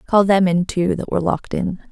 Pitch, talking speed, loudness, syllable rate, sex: 180 Hz, 250 wpm, -18 LUFS, 6.1 syllables/s, female